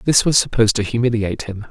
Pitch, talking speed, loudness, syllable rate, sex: 115 Hz, 210 wpm, -17 LUFS, 7.1 syllables/s, male